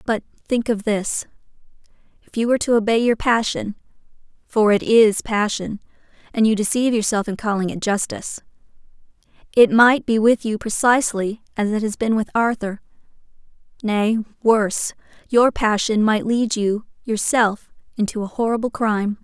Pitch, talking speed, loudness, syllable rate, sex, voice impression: 220 Hz, 140 wpm, -19 LUFS, 5.1 syllables/s, female, feminine, slightly adult-like, cute, slightly refreshing, slightly sweet, slightly kind